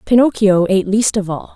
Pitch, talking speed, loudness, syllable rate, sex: 205 Hz, 190 wpm, -15 LUFS, 5.7 syllables/s, female